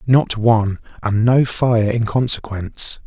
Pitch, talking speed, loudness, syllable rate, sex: 115 Hz, 135 wpm, -17 LUFS, 4.1 syllables/s, male